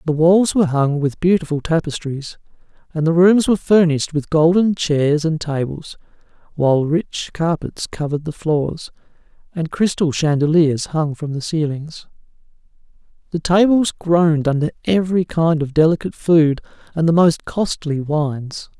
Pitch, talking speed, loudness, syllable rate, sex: 160 Hz, 140 wpm, -17 LUFS, 4.8 syllables/s, male